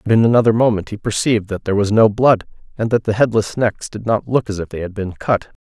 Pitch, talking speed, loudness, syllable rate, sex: 110 Hz, 265 wpm, -17 LUFS, 6.2 syllables/s, male